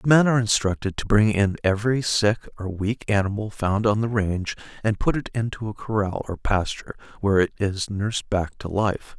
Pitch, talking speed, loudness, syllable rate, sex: 105 Hz, 200 wpm, -23 LUFS, 5.5 syllables/s, male